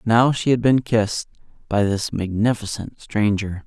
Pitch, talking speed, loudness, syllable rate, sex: 110 Hz, 145 wpm, -21 LUFS, 4.4 syllables/s, male